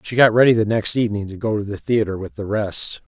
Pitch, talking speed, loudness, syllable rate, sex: 110 Hz, 265 wpm, -19 LUFS, 6.1 syllables/s, male